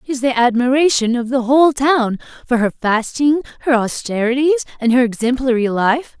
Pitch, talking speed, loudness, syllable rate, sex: 250 Hz, 165 wpm, -16 LUFS, 5.3 syllables/s, female